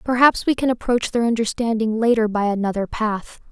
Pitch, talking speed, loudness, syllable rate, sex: 225 Hz, 170 wpm, -20 LUFS, 5.4 syllables/s, female